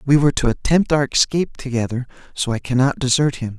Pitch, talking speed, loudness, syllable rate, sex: 130 Hz, 200 wpm, -19 LUFS, 6.3 syllables/s, male